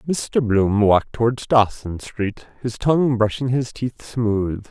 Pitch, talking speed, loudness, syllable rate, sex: 115 Hz, 155 wpm, -20 LUFS, 3.9 syllables/s, male